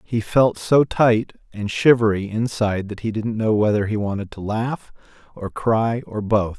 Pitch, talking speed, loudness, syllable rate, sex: 110 Hz, 180 wpm, -20 LUFS, 4.5 syllables/s, male